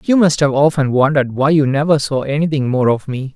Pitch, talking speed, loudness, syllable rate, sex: 140 Hz, 235 wpm, -15 LUFS, 5.9 syllables/s, male